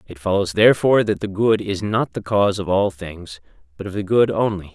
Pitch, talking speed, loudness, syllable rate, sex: 100 Hz, 225 wpm, -19 LUFS, 5.7 syllables/s, male